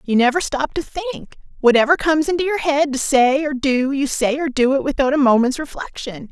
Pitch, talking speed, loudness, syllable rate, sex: 275 Hz, 210 wpm, -18 LUFS, 5.7 syllables/s, female